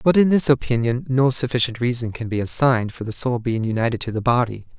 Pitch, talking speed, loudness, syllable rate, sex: 120 Hz, 225 wpm, -20 LUFS, 6.1 syllables/s, male